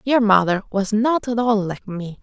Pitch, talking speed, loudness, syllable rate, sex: 215 Hz, 215 wpm, -19 LUFS, 4.4 syllables/s, female